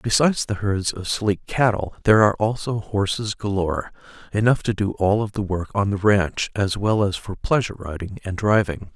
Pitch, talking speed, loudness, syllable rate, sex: 100 Hz, 195 wpm, -22 LUFS, 5.2 syllables/s, male